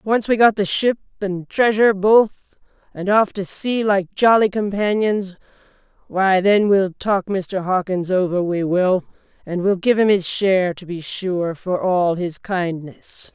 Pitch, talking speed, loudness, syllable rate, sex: 190 Hz, 165 wpm, -18 LUFS, 4.0 syllables/s, female